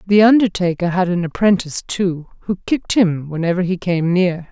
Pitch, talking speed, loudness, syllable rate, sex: 180 Hz, 175 wpm, -17 LUFS, 5.4 syllables/s, female